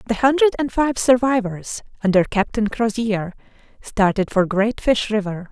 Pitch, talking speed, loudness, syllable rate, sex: 220 Hz, 140 wpm, -19 LUFS, 4.6 syllables/s, female